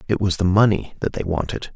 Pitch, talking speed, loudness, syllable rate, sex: 95 Hz, 240 wpm, -20 LUFS, 6.0 syllables/s, male